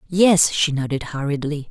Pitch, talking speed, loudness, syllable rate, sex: 155 Hz, 140 wpm, -19 LUFS, 4.5 syllables/s, female